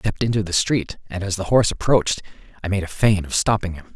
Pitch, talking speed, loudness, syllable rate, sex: 100 Hz, 260 wpm, -21 LUFS, 7.1 syllables/s, male